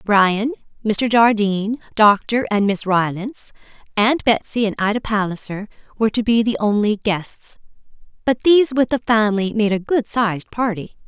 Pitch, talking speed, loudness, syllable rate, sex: 215 Hz, 150 wpm, -18 LUFS, 4.9 syllables/s, female